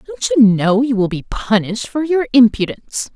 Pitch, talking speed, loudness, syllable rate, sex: 235 Hz, 190 wpm, -15 LUFS, 5.2 syllables/s, female